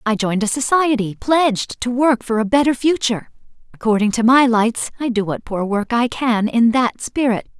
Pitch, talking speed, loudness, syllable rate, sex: 235 Hz, 200 wpm, -17 LUFS, 5.1 syllables/s, female